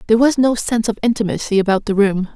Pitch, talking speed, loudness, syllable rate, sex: 220 Hz, 230 wpm, -16 LUFS, 7.1 syllables/s, female